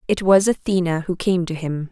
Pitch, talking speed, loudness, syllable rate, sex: 180 Hz, 220 wpm, -19 LUFS, 5.3 syllables/s, female